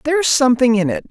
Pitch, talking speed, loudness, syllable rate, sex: 260 Hz, 220 wpm, -15 LUFS, 7.2 syllables/s, female